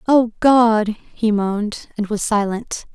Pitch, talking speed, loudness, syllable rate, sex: 220 Hz, 145 wpm, -18 LUFS, 3.7 syllables/s, female